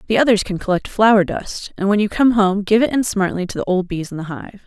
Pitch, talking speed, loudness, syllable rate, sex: 200 Hz, 285 wpm, -17 LUFS, 5.8 syllables/s, female